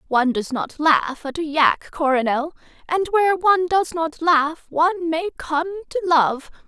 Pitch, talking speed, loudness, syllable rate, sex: 315 Hz, 170 wpm, -20 LUFS, 4.6 syllables/s, female